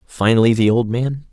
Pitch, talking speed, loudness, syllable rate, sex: 115 Hz, 180 wpm, -16 LUFS, 5.1 syllables/s, male